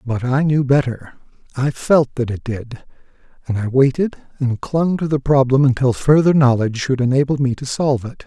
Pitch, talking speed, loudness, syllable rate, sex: 135 Hz, 190 wpm, -17 LUFS, 5.3 syllables/s, male